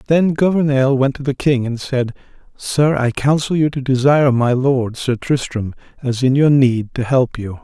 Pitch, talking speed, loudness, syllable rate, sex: 130 Hz, 195 wpm, -16 LUFS, 4.6 syllables/s, male